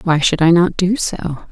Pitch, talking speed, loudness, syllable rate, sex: 170 Hz, 240 wpm, -15 LUFS, 4.4 syllables/s, female